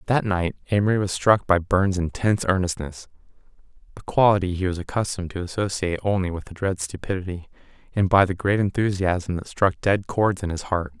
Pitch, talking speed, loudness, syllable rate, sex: 95 Hz, 185 wpm, -23 LUFS, 5.9 syllables/s, male